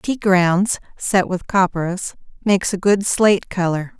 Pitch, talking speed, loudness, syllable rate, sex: 190 Hz, 150 wpm, -18 LUFS, 4.3 syllables/s, female